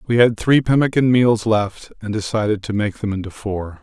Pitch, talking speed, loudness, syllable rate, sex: 110 Hz, 205 wpm, -18 LUFS, 5.0 syllables/s, male